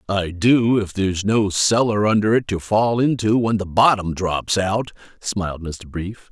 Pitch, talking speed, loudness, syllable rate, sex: 100 Hz, 180 wpm, -19 LUFS, 4.3 syllables/s, male